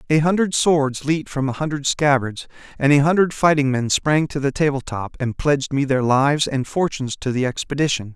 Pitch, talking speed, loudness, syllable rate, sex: 140 Hz, 205 wpm, -19 LUFS, 5.5 syllables/s, male